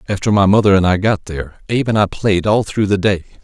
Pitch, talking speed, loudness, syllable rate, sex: 100 Hz, 260 wpm, -15 LUFS, 6.3 syllables/s, male